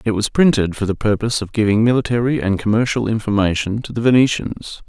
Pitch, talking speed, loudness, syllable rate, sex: 110 Hz, 185 wpm, -17 LUFS, 6.1 syllables/s, male